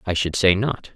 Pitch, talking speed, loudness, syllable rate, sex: 95 Hz, 250 wpm, -20 LUFS, 4.8 syllables/s, male